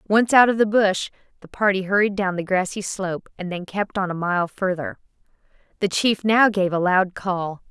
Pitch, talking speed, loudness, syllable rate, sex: 195 Hz, 205 wpm, -21 LUFS, 4.9 syllables/s, female